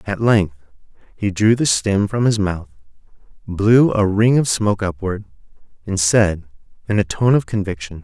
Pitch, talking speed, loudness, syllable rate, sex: 100 Hz, 165 wpm, -17 LUFS, 4.7 syllables/s, male